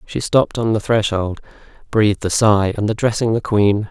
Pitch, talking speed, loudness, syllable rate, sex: 105 Hz, 185 wpm, -17 LUFS, 5.2 syllables/s, male